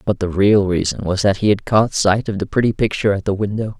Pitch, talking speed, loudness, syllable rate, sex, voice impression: 100 Hz, 270 wpm, -17 LUFS, 6.0 syllables/s, male, masculine, adult-like, tensed, powerful, slightly bright, clear, nasal, intellectual, friendly, unique, slightly wild, lively